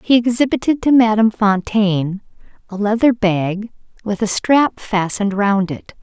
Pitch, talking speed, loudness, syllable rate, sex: 215 Hz, 140 wpm, -16 LUFS, 4.7 syllables/s, female